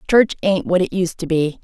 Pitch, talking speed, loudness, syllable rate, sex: 180 Hz, 255 wpm, -18 LUFS, 5.1 syllables/s, female